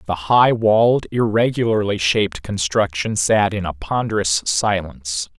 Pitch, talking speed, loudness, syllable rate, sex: 100 Hz, 125 wpm, -18 LUFS, 4.5 syllables/s, male